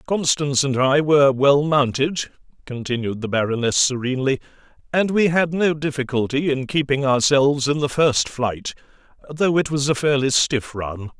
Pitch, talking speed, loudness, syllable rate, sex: 135 Hz, 155 wpm, -19 LUFS, 5.0 syllables/s, male